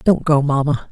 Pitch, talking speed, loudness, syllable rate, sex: 145 Hz, 195 wpm, -16 LUFS, 5.1 syllables/s, female